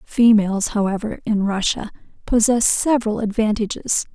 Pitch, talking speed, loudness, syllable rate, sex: 215 Hz, 100 wpm, -19 LUFS, 5.0 syllables/s, female